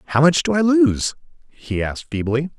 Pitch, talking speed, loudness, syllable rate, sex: 150 Hz, 185 wpm, -19 LUFS, 5.3 syllables/s, male